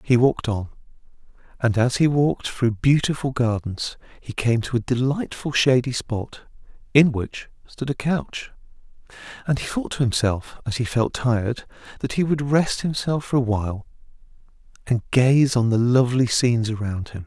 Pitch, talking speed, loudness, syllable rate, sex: 125 Hz, 165 wpm, -22 LUFS, 4.8 syllables/s, male